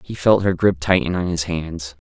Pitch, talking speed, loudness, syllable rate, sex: 85 Hz, 230 wpm, -19 LUFS, 4.8 syllables/s, male